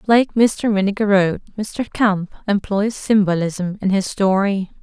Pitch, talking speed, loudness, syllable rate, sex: 200 Hz, 125 wpm, -18 LUFS, 4.3 syllables/s, female